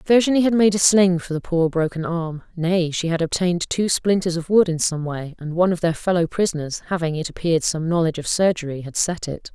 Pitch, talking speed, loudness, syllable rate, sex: 170 Hz, 220 wpm, -20 LUFS, 5.9 syllables/s, female